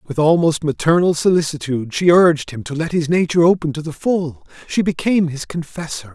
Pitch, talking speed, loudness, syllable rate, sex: 160 Hz, 185 wpm, -17 LUFS, 5.8 syllables/s, male